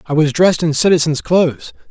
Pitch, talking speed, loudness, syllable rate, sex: 160 Hz, 190 wpm, -14 LUFS, 6.1 syllables/s, male